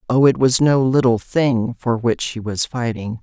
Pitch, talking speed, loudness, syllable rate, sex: 125 Hz, 205 wpm, -18 LUFS, 4.3 syllables/s, female